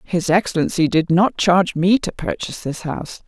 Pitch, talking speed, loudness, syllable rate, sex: 180 Hz, 185 wpm, -18 LUFS, 5.4 syllables/s, female